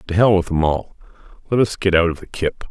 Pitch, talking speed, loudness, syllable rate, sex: 90 Hz, 265 wpm, -18 LUFS, 6.0 syllables/s, male